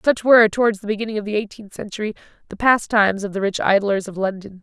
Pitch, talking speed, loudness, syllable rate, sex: 210 Hz, 220 wpm, -19 LUFS, 6.7 syllables/s, female